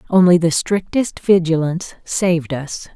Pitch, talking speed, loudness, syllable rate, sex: 175 Hz, 120 wpm, -17 LUFS, 4.6 syllables/s, female